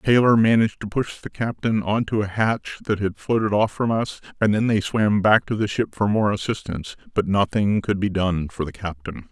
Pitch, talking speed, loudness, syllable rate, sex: 105 Hz, 225 wpm, -22 LUFS, 5.3 syllables/s, male